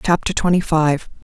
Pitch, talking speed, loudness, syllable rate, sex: 165 Hz, 140 wpm, -18 LUFS, 4.9 syllables/s, female